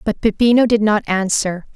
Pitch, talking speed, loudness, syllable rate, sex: 210 Hz, 170 wpm, -16 LUFS, 5.0 syllables/s, female